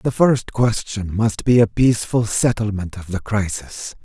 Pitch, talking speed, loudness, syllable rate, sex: 110 Hz, 165 wpm, -19 LUFS, 4.3 syllables/s, male